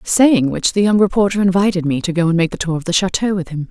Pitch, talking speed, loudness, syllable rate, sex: 185 Hz, 290 wpm, -16 LUFS, 6.4 syllables/s, female